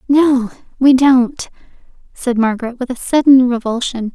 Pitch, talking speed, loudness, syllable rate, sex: 250 Hz, 130 wpm, -14 LUFS, 4.6 syllables/s, female